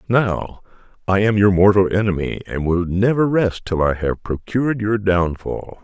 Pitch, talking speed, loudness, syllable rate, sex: 100 Hz, 165 wpm, -18 LUFS, 4.5 syllables/s, male